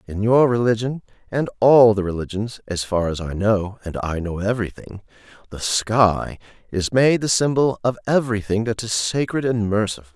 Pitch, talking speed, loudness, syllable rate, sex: 110 Hz, 170 wpm, -20 LUFS, 4.6 syllables/s, male